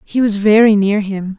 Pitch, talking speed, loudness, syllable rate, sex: 205 Hz, 215 wpm, -13 LUFS, 4.7 syllables/s, female